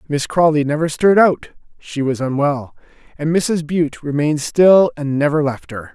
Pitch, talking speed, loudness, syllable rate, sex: 150 Hz, 150 wpm, -16 LUFS, 4.7 syllables/s, male